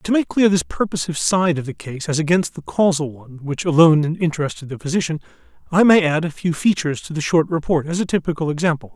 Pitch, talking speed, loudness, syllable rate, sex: 165 Hz, 220 wpm, -19 LUFS, 6.3 syllables/s, male